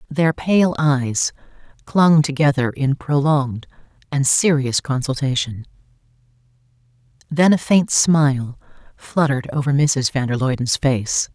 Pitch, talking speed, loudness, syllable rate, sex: 140 Hz, 110 wpm, -18 LUFS, 4.2 syllables/s, female